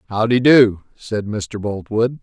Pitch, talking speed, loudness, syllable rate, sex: 110 Hz, 160 wpm, -17 LUFS, 3.7 syllables/s, male